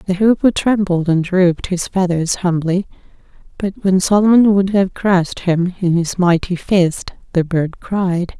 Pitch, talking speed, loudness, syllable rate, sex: 185 Hz, 155 wpm, -16 LUFS, 4.3 syllables/s, female